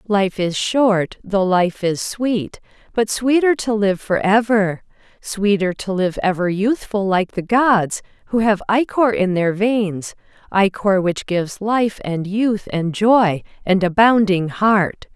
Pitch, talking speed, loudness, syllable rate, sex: 200 Hz, 150 wpm, -18 LUFS, 3.6 syllables/s, female